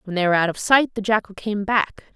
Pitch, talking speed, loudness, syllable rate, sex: 205 Hz, 280 wpm, -20 LUFS, 6.4 syllables/s, female